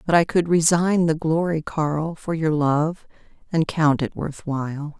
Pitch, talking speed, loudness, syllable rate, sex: 160 Hz, 180 wpm, -21 LUFS, 4.1 syllables/s, female